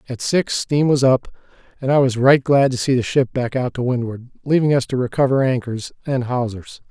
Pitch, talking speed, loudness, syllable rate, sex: 130 Hz, 215 wpm, -18 LUFS, 5.3 syllables/s, male